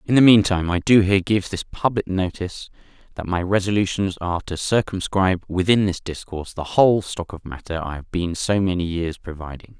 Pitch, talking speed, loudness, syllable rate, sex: 95 Hz, 190 wpm, -21 LUFS, 5.7 syllables/s, male